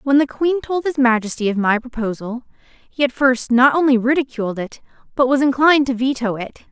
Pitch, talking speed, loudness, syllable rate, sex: 255 Hz, 195 wpm, -17 LUFS, 5.8 syllables/s, female